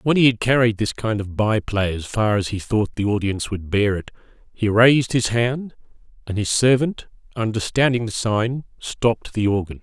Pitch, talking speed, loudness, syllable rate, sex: 110 Hz, 195 wpm, -20 LUFS, 5.0 syllables/s, male